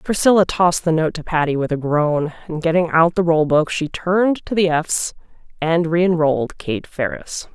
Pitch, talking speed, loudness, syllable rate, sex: 165 Hz, 190 wpm, -18 LUFS, 4.9 syllables/s, female